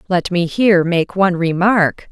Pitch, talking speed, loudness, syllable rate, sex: 180 Hz, 170 wpm, -15 LUFS, 4.7 syllables/s, female